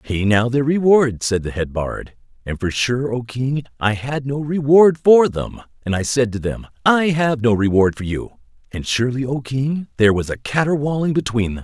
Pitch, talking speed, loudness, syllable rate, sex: 125 Hz, 205 wpm, -18 LUFS, 4.9 syllables/s, male